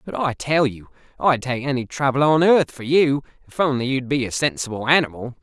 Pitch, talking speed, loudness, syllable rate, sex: 135 Hz, 210 wpm, -20 LUFS, 5.5 syllables/s, male